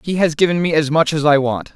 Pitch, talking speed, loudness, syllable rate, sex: 155 Hz, 310 wpm, -16 LUFS, 6.1 syllables/s, male